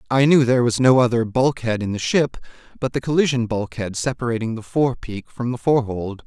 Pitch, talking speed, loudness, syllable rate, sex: 120 Hz, 190 wpm, -20 LUFS, 5.8 syllables/s, male